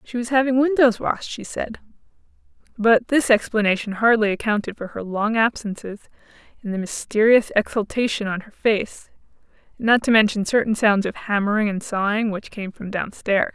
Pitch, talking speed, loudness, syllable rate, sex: 220 Hz, 165 wpm, -20 LUFS, 5.1 syllables/s, female